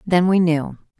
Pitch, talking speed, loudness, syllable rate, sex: 170 Hz, 180 wpm, -18 LUFS, 4.4 syllables/s, female